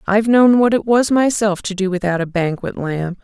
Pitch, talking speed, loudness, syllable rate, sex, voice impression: 205 Hz, 225 wpm, -16 LUFS, 5.2 syllables/s, female, feminine, adult-like, tensed, slightly bright, clear, fluent, intellectual, friendly, reassuring, elegant, lively